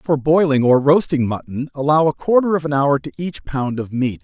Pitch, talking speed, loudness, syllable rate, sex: 145 Hz, 225 wpm, -17 LUFS, 5.2 syllables/s, male